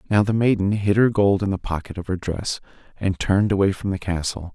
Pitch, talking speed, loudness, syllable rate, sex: 95 Hz, 240 wpm, -21 LUFS, 5.8 syllables/s, male